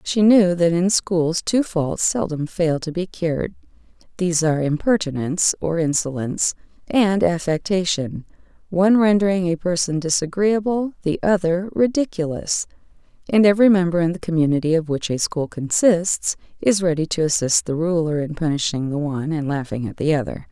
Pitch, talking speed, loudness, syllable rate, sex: 170 Hz, 150 wpm, -20 LUFS, 5.2 syllables/s, female